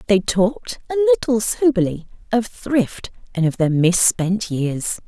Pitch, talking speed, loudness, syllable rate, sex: 210 Hz, 140 wpm, -19 LUFS, 4.6 syllables/s, female